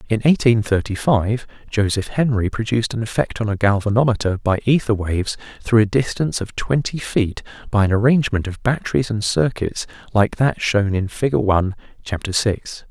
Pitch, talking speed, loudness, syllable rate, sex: 110 Hz, 165 wpm, -19 LUFS, 5.3 syllables/s, male